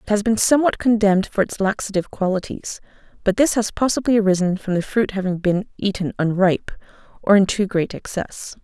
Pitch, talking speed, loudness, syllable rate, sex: 200 Hz, 180 wpm, -20 LUFS, 5.8 syllables/s, female